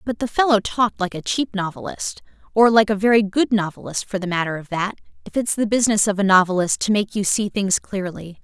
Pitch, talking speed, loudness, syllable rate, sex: 205 Hz, 220 wpm, -20 LUFS, 5.9 syllables/s, female